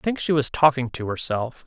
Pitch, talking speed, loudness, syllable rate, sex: 135 Hz, 250 wpm, -22 LUFS, 5.5 syllables/s, male